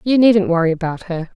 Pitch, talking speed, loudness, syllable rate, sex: 185 Hz, 215 wpm, -16 LUFS, 5.6 syllables/s, female